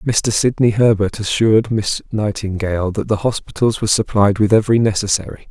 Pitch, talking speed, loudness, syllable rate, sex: 105 Hz, 155 wpm, -16 LUFS, 5.6 syllables/s, male